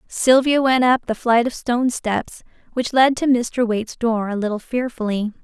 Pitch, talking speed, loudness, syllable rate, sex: 240 Hz, 190 wpm, -19 LUFS, 4.7 syllables/s, female